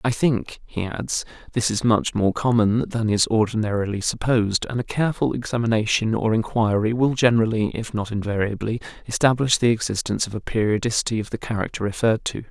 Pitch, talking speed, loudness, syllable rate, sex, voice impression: 110 Hz, 170 wpm, -22 LUFS, 5.9 syllables/s, male, masculine, adult-like, slightly middle-aged, slightly thick, slightly relaxed, slightly weak, slightly dark, slightly soft, slightly muffled, very fluent, slightly raspy, cool, very intellectual, very refreshing, very sincere, slightly calm, slightly mature, slightly friendly, slightly reassuring, unique, elegant, slightly sweet, slightly lively, kind, modest, slightly light